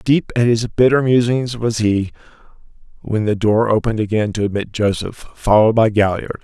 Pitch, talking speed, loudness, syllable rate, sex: 110 Hz, 170 wpm, -17 LUFS, 5.3 syllables/s, male